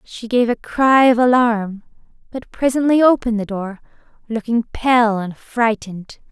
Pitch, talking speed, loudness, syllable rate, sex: 230 Hz, 145 wpm, -17 LUFS, 4.4 syllables/s, female